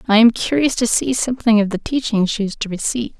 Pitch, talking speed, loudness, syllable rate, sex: 225 Hz, 245 wpm, -17 LUFS, 6.3 syllables/s, female